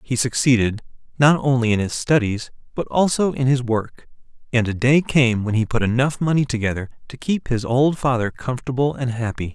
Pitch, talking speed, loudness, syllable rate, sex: 125 Hz, 190 wpm, -20 LUFS, 5.4 syllables/s, male